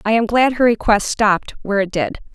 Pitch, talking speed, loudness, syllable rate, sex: 215 Hz, 230 wpm, -17 LUFS, 5.9 syllables/s, female